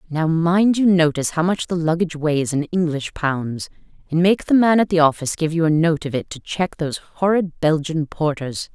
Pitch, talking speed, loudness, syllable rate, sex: 165 Hz, 215 wpm, -19 LUFS, 5.2 syllables/s, female